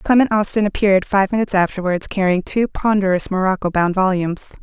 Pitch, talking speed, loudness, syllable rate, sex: 195 Hz, 155 wpm, -17 LUFS, 6.2 syllables/s, female